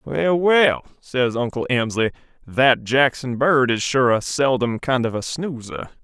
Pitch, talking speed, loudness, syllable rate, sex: 130 Hz, 160 wpm, -19 LUFS, 3.9 syllables/s, male